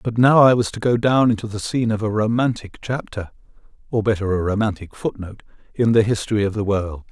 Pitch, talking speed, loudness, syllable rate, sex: 110 Hz, 195 wpm, -19 LUFS, 6.1 syllables/s, male